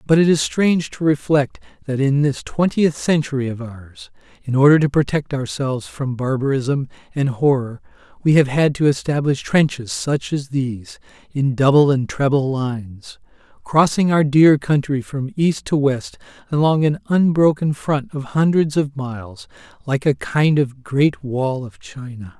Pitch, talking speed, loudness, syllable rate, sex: 140 Hz, 160 wpm, -18 LUFS, 4.5 syllables/s, male